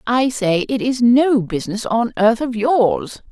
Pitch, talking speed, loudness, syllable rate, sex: 235 Hz, 180 wpm, -17 LUFS, 3.9 syllables/s, female